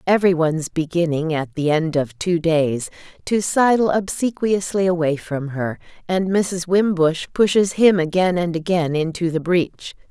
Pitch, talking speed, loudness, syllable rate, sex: 170 Hz, 145 wpm, -19 LUFS, 4.5 syllables/s, female